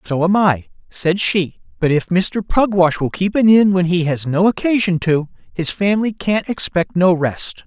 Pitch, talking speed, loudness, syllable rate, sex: 180 Hz, 195 wpm, -16 LUFS, 4.5 syllables/s, male